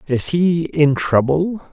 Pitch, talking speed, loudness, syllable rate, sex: 160 Hz, 140 wpm, -17 LUFS, 3.3 syllables/s, male